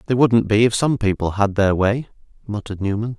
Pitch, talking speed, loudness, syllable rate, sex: 110 Hz, 205 wpm, -19 LUFS, 5.7 syllables/s, male